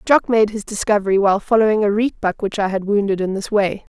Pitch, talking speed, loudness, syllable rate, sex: 205 Hz, 230 wpm, -18 LUFS, 6.3 syllables/s, female